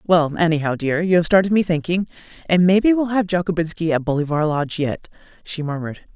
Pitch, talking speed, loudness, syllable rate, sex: 170 Hz, 185 wpm, -19 LUFS, 6.2 syllables/s, female